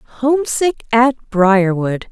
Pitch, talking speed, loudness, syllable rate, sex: 235 Hz, 85 wpm, -15 LUFS, 3.1 syllables/s, female